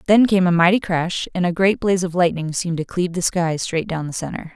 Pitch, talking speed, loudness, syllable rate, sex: 175 Hz, 265 wpm, -19 LUFS, 6.0 syllables/s, female